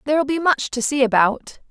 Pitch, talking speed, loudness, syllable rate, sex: 270 Hz, 210 wpm, -19 LUFS, 5.3 syllables/s, female